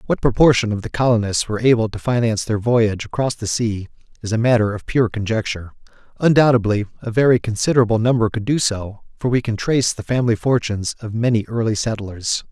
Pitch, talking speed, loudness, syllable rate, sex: 115 Hz, 185 wpm, -19 LUFS, 6.2 syllables/s, male